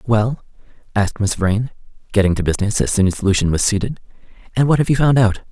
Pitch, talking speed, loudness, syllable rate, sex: 110 Hz, 205 wpm, -17 LUFS, 6.4 syllables/s, male